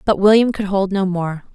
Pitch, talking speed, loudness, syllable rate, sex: 195 Hz, 235 wpm, -17 LUFS, 4.9 syllables/s, female